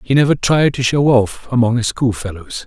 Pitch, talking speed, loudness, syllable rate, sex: 125 Hz, 205 wpm, -15 LUFS, 5.1 syllables/s, male